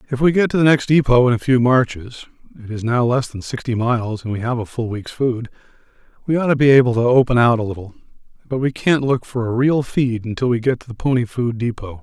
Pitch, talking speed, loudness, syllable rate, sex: 120 Hz, 255 wpm, -18 LUFS, 4.7 syllables/s, male